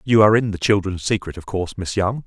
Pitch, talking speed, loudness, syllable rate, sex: 100 Hz, 265 wpm, -20 LUFS, 6.5 syllables/s, male